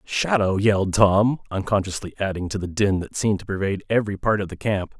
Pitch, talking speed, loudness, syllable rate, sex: 100 Hz, 205 wpm, -22 LUFS, 6.1 syllables/s, male